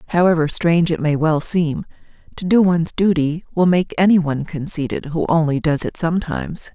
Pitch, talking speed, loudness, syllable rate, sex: 165 Hz, 180 wpm, -18 LUFS, 5.6 syllables/s, female